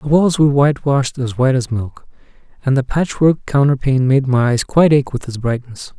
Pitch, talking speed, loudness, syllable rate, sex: 135 Hz, 200 wpm, -16 LUFS, 5.8 syllables/s, male